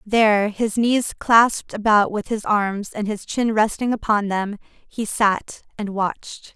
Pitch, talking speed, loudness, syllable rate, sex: 210 Hz, 165 wpm, -20 LUFS, 4.0 syllables/s, female